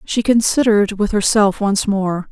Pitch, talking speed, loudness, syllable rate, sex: 205 Hz, 155 wpm, -16 LUFS, 4.5 syllables/s, female